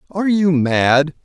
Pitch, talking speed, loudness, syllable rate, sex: 160 Hz, 145 wpm, -15 LUFS, 4.2 syllables/s, male